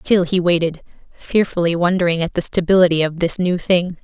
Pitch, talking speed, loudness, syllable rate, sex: 175 Hz, 180 wpm, -17 LUFS, 5.5 syllables/s, female